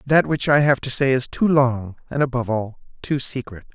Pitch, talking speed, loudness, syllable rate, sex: 130 Hz, 225 wpm, -20 LUFS, 5.3 syllables/s, male